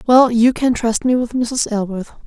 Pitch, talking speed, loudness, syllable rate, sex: 235 Hz, 210 wpm, -16 LUFS, 4.5 syllables/s, female